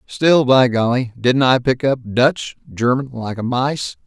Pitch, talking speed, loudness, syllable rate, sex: 125 Hz, 150 wpm, -17 LUFS, 3.8 syllables/s, male